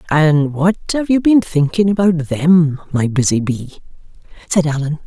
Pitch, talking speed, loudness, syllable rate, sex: 165 Hz, 155 wpm, -15 LUFS, 4.4 syllables/s, female